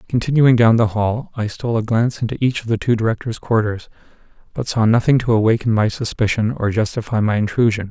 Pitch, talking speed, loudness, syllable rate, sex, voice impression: 115 Hz, 195 wpm, -18 LUFS, 6.1 syllables/s, male, very masculine, very adult-like, old, very thick, very relaxed, slightly weak, dark, very soft, muffled, slightly halting, slightly cool, intellectual, slightly sincere, very calm, mature, very friendly, very reassuring, slightly unique, slightly elegant, slightly wild, very kind, very modest